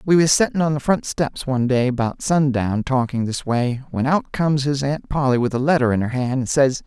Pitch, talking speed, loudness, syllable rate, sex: 135 Hz, 245 wpm, -20 LUFS, 5.4 syllables/s, male